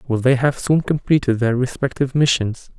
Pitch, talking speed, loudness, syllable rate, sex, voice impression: 130 Hz, 170 wpm, -18 LUFS, 5.2 syllables/s, male, masculine, adult-like, slightly relaxed, soft, slightly halting, calm, friendly, reassuring, kind